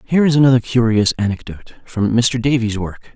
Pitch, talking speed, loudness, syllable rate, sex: 115 Hz, 170 wpm, -16 LUFS, 5.7 syllables/s, male